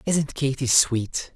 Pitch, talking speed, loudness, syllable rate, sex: 130 Hz, 135 wpm, -22 LUFS, 3.3 syllables/s, male